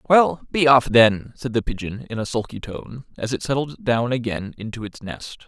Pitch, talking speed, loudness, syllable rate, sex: 120 Hz, 210 wpm, -21 LUFS, 4.9 syllables/s, male